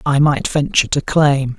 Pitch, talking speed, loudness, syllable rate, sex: 140 Hz, 190 wpm, -15 LUFS, 4.8 syllables/s, male